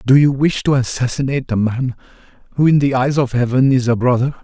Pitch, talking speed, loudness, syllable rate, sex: 130 Hz, 215 wpm, -16 LUFS, 6.0 syllables/s, male